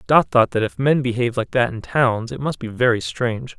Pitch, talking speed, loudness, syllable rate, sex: 120 Hz, 250 wpm, -20 LUFS, 5.5 syllables/s, male